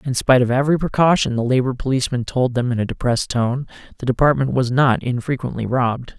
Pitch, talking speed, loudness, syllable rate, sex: 130 Hz, 195 wpm, -19 LUFS, 6.5 syllables/s, male